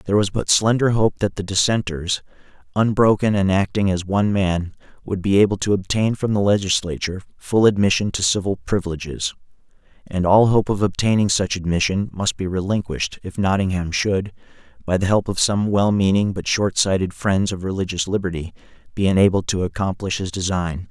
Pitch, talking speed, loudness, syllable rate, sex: 95 Hz, 165 wpm, -20 LUFS, 5.5 syllables/s, male